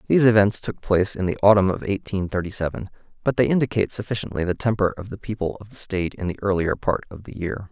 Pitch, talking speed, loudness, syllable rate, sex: 100 Hz, 235 wpm, -22 LUFS, 6.7 syllables/s, male